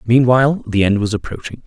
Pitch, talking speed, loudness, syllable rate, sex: 115 Hz, 180 wpm, -15 LUFS, 6.0 syllables/s, male